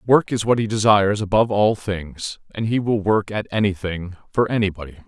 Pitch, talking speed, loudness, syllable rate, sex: 105 Hz, 190 wpm, -20 LUFS, 5.4 syllables/s, male